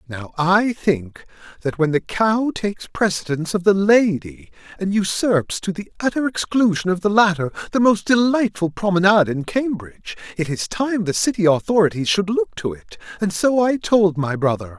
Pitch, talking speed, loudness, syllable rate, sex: 185 Hz, 175 wpm, -19 LUFS, 5.0 syllables/s, male